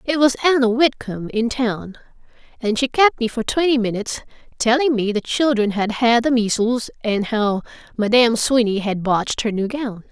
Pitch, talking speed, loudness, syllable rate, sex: 235 Hz, 180 wpm, -19 LUFS, 5.0 syllables/s, female